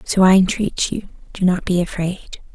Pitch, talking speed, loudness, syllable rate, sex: 185 Hz, 190 wpm, -18 LUFS, 4.7 syllables/s, female